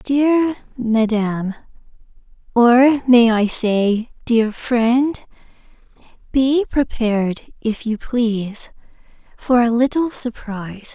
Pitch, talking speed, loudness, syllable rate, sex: 240 Hz, 80 wpm, -18 LUFS, 4.8 syllables/s, female